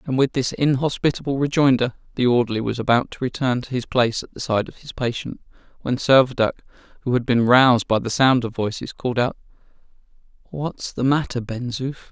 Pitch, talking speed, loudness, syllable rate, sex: 125 Hz, 190 wpm, -21 LUFS, 5.9 syllables/s, male